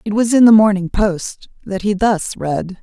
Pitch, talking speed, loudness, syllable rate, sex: 200 Hz, 210 wpm, -15 LUFS, 4.3 syllables/s, female